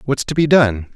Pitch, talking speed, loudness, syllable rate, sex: 130 Hz, 250 wpm, -15 LUFS, 5.0 syllables/s, male